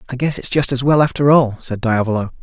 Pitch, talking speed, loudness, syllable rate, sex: 130 Hz, 250 wpm, -16 LUFS, 6.3 syllables/s, male